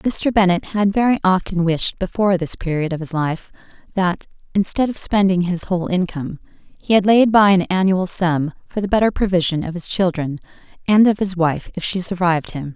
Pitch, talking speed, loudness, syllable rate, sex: 185 Hz, 195 wpm, -18 LUFS, 5.3 syllables/s, female